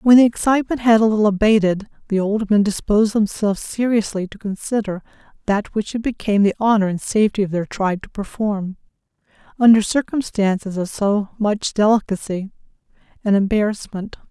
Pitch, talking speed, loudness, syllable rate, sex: 210 Hz, 150 wpm, -19 LUFS, 5.7 syllables/s, female